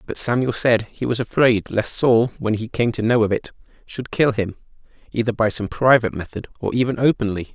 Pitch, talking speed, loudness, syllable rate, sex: 115 Hz, 205 wpm, -20 LUFS, 5.5 syllables/s, male